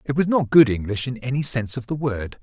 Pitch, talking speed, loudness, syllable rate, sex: 130 Hz, 270 wpm, -21 LUFS, 6.0 syllables/s, male